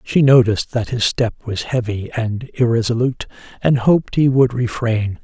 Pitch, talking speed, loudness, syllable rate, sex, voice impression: 120 Hz, 160 wpm, -17 LUFS, 4.9 syllables/s, male, very masculine, slightly old, thick, sincere, calm, slightly elegant, slightly kind